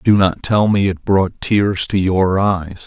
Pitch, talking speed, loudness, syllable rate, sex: 95 Hz, 210 wpm, -16 LUFS, 3.6 syllables/s, male